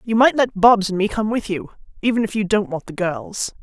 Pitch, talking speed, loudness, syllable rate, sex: 205 Hz, 265 wpm, -19 LUFS, 5.3 syllables/s, female